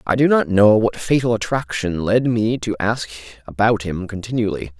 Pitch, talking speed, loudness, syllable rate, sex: 105 Hz, 175 wpm, -18 LUFS, 5.0 syllables/s, male